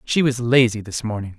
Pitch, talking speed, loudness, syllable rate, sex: 115 Hz, 215 wpm, -19 LUFS, 5.4 syllables/s, male